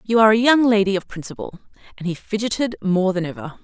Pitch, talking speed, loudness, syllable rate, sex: 205 Hz, 215 wpm, -19 LUFS, 6.4 syllables/s, female